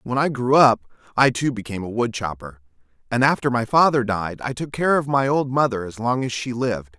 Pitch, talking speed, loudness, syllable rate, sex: 120 Hz, 225 wpm, -21 LUFS, 5.6 syllables/s, male